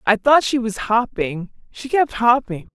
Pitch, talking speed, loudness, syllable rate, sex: 235 Hz, 175 wpm, -18 LUFS, 4.2 syllables/s, female